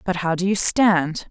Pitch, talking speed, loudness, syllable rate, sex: 180 Hz, 230 wpm, -18 LUFS, 4.2 syllables/s, female